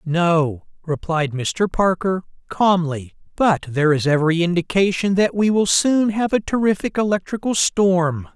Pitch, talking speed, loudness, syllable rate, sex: 180 Hz, 135 wpm, -19 LUFS, 4.4 syllables/s, male